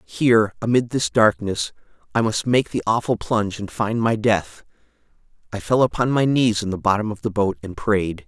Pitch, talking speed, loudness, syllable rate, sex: 110 Hz, 195 wpm, -20 LUFS, 5.1 syllables/s, male